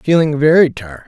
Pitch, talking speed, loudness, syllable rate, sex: 145 Hz, 170 wpm, -13 LUFS, 6.0 syllables/s, male